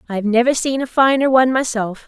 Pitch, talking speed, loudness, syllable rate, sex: 245 Hz, 230 wpm, -16 LUFS, 6.4 syllables/s, female